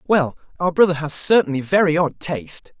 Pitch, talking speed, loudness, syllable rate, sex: 165 Hz, 170 wpm, -19 LUFS, 5.4 syllables/s, male